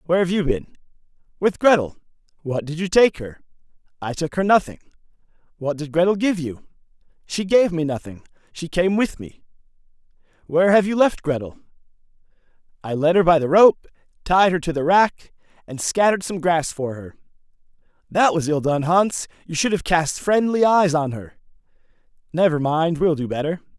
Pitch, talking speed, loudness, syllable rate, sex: 165 Hz, 170 wpm, -20 LUFS, 5.3 syllables/s, male